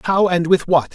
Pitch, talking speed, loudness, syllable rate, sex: 170 Hz, 255 wpm, -16 LUFS, 4.8 syllables/s, male